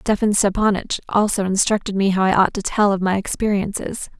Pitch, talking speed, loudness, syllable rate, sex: 200 Hz, 185 wpm, -19 LUFS, 5.5 syllables/s, female